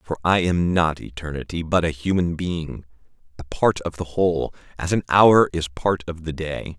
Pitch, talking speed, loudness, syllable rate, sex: 85 Hz, 185 wpm, -22 LUFS, 4.7 syllables/s, male